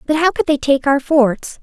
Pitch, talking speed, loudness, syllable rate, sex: 280 Hz, 260 wpm, -15 LUFS, 4.7 syllables/s, female